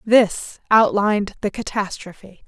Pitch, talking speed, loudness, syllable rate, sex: 205 Hz, 95 wpm, -19 LUFS, 4.1 syllables/s, female